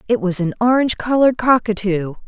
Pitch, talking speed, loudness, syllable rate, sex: 215 Hz, 160 wpm, -17 LUFS, 6.1 syllables/s, female